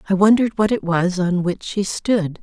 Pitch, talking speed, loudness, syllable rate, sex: 195 Hz, 225 wpm, -19 LUFS, 5.0 syllables/s, female